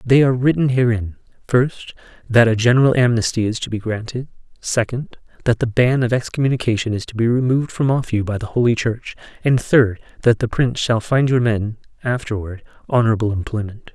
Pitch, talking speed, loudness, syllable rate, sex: 120 Hz, 180 wpm, -18 LUFS, 5.8 syllables/s, male